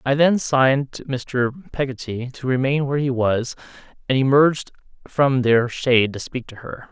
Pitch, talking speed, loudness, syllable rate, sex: 130 Hz, 175 wpm, -20 LUFS, 4.8 syllables/s, male